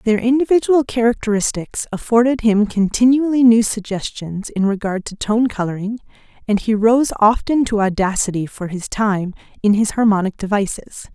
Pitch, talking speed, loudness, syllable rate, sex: 220 Hz, 140 wpm, -17 LUFS, 5.0 syllables/s, female